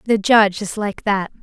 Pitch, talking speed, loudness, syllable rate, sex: 205 Hz, 210 wpm, -17 LUFS, 5.2 syllables/s, female